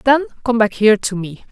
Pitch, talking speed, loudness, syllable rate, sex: 230 Hz, 240 wpm, -16 LUFS, 5.9 syllables/s, female